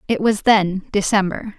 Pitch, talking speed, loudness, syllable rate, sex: 205 Hz, 150 wpm, -18 LUFS, 4.4 syllables/s, female